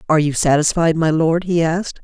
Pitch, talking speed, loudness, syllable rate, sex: 160 Hz, 205 wpm, -16 LUFS, 6.0 syllables/s, female